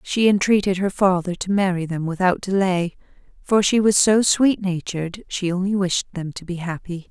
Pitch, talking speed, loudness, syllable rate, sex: 185 Hz, 185 wpm, -20 LUFS, 5.0 syllables/s, female